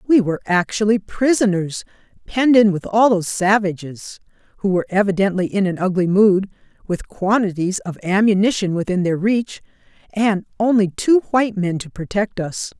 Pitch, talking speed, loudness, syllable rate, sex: 200 Hz, 145 wpm, -18 LUFS, 5.2 syllables/s, female